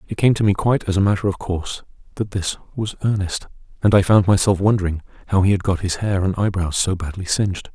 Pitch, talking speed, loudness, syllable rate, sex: 95 Hz, 235 wpm, -20 LUFS, 6.4 syllables/s, male